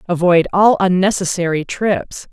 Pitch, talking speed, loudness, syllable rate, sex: 180 Hz, 105 wpm, -15 LUFS, 4.4 syllables/s, female